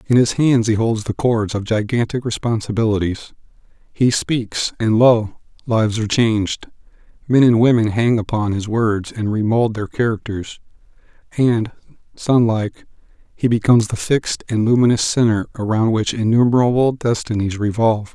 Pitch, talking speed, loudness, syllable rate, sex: 110 Hz, 140 wpm, -17 LUFS, 5.0 syllables/s, male